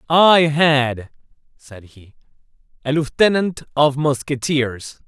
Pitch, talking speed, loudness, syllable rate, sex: 140 Hz, 95 wpm, -17 LUFS, 3.4 syllables/s, male